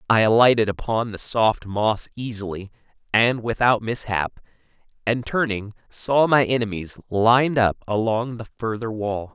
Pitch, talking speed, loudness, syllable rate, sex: 110 Hz, 135 wpm, -21 LUFS, 4.4 syllables/s, male